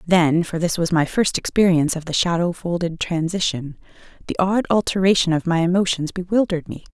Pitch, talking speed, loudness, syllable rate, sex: 175 Hz, 170 wpm, -20 LUFS, 5.6 syllables/s, female